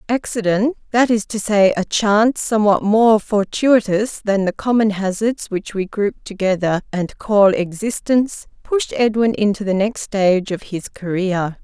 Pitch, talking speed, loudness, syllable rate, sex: 210 Hz, 145 wpm, -18 LUFS, 4.4 syllables/s, female